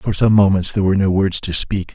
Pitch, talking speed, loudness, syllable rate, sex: 95 Hz, 310 wpm, -16 LUFS, 7.0 syllables/s, male